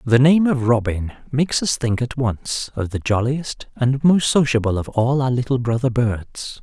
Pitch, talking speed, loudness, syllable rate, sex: 125 Hz, 190 wpm, -19 LUFS, 4.5 syllables/s, male